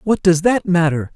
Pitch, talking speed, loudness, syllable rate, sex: 175 Hz, 210 wpm, -16 LUFS, 4.8 syllables/s, male